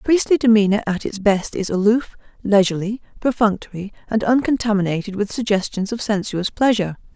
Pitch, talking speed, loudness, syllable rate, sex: 210 Hz, 135 wpm, -19 LUFS, 5.7 syllables/s, female